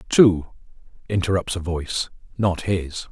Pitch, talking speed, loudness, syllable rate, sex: 90 Hz, 95 wpm, -22 LUFS, 4.3 syllables/s, male